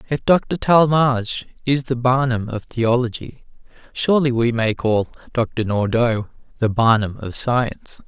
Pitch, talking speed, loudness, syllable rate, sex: 120 Hz, 135 wpm, -19 LUFS, 4.5 syllables/s, male